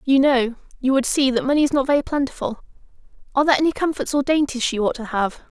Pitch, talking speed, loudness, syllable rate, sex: 265 Hz, 215 wpm, -20 LUFS, 6.8 syllables/s, female